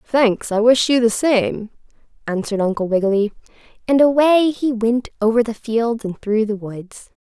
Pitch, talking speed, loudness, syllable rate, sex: 230 Hz, 165 wpm, -18 LUFS, 4.6 syllables/s, female